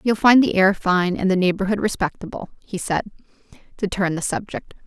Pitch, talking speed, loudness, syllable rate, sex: 195 Hz, 185 wpm, -20 LUFS, 5.5 syllables/s, female